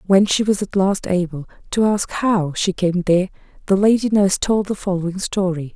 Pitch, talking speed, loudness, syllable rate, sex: 190 Hz, 200 wpm, -19 LUFS, 5.3 syllables/s, female